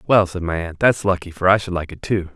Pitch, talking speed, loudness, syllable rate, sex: 90 Hz, 305 wpm, -19 LUFS, 6.1 syllables/s, male